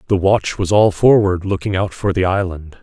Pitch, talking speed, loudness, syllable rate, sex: 95 Hz, 215 wpm, -16 LUFS, 4.9 syllables/s, male